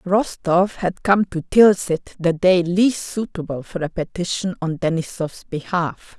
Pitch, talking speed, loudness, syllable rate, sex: 175 Hz, 145 wpm, -20 LUFS, 4.0 syllables/s, female